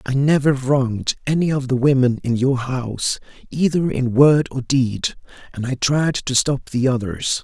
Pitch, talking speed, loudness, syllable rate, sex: 130 Hz, 175 wpm, -19 LUFS, 4.5 syllables/s, male